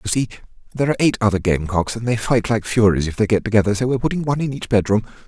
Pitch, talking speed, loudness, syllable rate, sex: 110 Hz, 260 wpm, -19 LUFS, 7.9 syllables/s, male